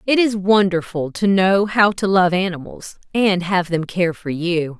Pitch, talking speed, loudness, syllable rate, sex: 185 Hz, 190 wpm, -18 LUFS, 4.2 syllables/s, female